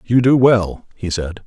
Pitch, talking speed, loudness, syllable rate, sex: 110 Hz, 205 wpm, -15 LUFS, 3.9 syllables/s, male